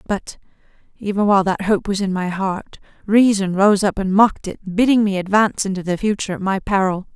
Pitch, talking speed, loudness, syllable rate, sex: 195 Hz, 200 wpm, -18 LUFS, 5.7 syllables/s, female